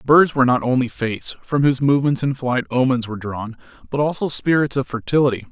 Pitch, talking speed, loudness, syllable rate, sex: 130 Hz, 195 wpm, -19 LUFS, 6.4 syllables/s, male